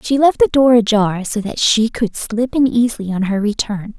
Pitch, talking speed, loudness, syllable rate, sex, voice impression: 225 Hz, 225 wpm, -15 LUFS, 4.9 syllables/s, female, feminine, young, tensed, slightly powerful, bright, clear, fluent, cute, friendly, sweet, lively, slightly kind, slightly intense